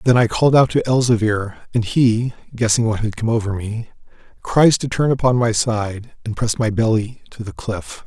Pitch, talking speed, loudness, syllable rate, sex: 115 Hz, 200 wpm, -18 LUFS, 4.9 syllables/s, male